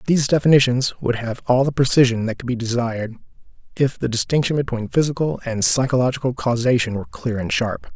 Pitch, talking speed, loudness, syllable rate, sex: 125 Hz, 175 wpm, -20 LUFS, 6.1 syllables/s, male